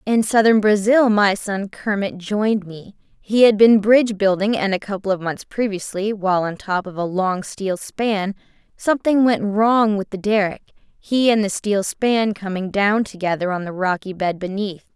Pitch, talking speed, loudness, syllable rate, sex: 205 Hz, 185 wpm, -19 LUFS, 4.7 syllables/s, female